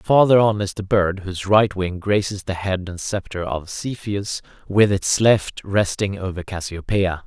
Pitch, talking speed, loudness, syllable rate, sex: 100 Hz, 175 wpm, -20 LUFS, 4.3 syllables/s, male